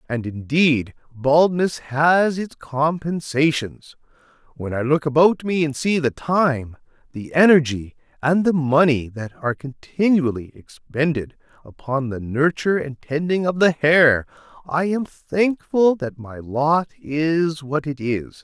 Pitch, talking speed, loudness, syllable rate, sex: 150 Hz, 135 wpm, -20 LUFS, 3.9 syllables/s, male